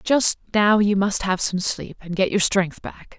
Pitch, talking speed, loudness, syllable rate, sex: 195 Hz, 225 wpm, -20 LUFS, 4.2 syllables/s, female